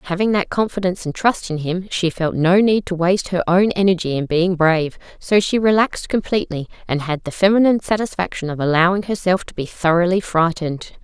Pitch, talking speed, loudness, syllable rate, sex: 180 Hz, 190 wpm, -18 LUFS, 5.9 syllables/s, female